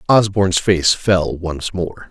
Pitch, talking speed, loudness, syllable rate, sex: 90 Hz, 140 wpm, -17 LUFS, 3.6 syllables/s, male